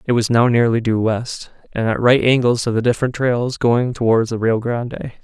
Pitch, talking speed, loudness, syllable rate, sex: 120 Hz, 220 wpm, -17 LUFS, 5.1 syllables/s, male